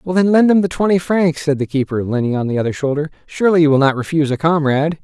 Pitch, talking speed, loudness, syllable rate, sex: 155 Hz, 260 wpm, -16 LUFS, 6.9 syllables/s, male